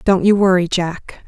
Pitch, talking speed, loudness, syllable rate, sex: 185 Hz, 190 wpm, -15 LUFS, 4.3 syllables/s, female